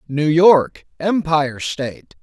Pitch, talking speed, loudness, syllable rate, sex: 155 Hz, 110 wpm, -17 LUFS, 3.7 syllables/s, male